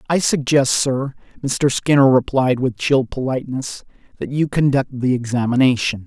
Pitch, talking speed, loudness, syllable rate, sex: 130 Hz, 140 wpm, -18 LUFS, 4.8 syllables/s, male